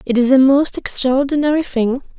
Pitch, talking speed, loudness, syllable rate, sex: 265 Hz, 165 wpm, -15 LUFS, 5.2 syllables/s, female